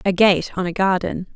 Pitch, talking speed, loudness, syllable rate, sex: 185 Hz, 220 wpm, -19 LUFS, 5.0 syllables/s, female